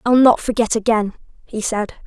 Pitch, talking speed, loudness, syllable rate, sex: 225 Hz, 175 wpm, -18 LUFS, 5.2 syllables/s, female